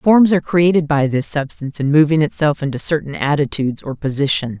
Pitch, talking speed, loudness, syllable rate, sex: 150 Hz, 185 wpm, -17 LUFS, 5.9 syllables/s, female